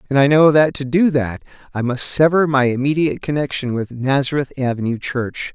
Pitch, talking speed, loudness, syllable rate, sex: 135 Hz, 185 wpm, -17 LUFS, 5.4 syllables/s, male